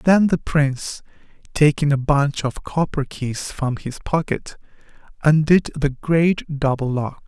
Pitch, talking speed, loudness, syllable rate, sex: 145 Hz, 140 wpm, -20 LUFS, 3.9 syllables/s, male